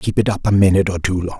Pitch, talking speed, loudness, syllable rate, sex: 95 Hz, 345 wpm, -16 LUFS, 8.3 syllables/s, male